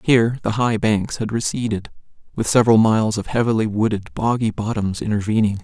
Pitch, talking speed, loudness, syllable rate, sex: 110 Hz, 160 wpm, -19 LUFS, 5.8 syllables/s, male